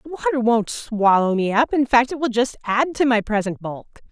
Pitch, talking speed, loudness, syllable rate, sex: 235 Hz, 235 wpm, -19 LUFS, 5.3 syllables/s, female